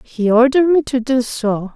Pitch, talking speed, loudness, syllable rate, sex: 250 Hz, 205 wpm, -15 LUFS, 4.9 syllables/s, female